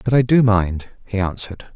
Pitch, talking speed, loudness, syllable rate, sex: 105 Hz, 205 wpm, -18 LUFS, 5.1 syllables/s, male